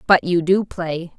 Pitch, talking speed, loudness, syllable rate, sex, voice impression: 175 Hz, 200 wpm, -19 LUFS, 4.0 syllables/s, female, feminine, adult-like, tensed, powerful, clear, slightly halting, intellectual, calm, friendly, slightly reassuring, elegant, lively, slightly sharp